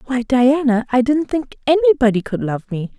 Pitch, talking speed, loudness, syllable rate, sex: 255 Hz, 180 wpm, -17 LUFS, 5.0 syllables/s, female